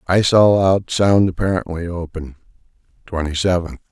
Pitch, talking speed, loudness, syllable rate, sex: 90 Hz, 125 wpm, -17 LUFS, 5.1 syllables/s, male